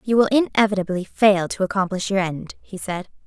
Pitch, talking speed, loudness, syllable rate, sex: 195 Hz, 185 wpm, -20 LUFS, 5.4 syllables/s, female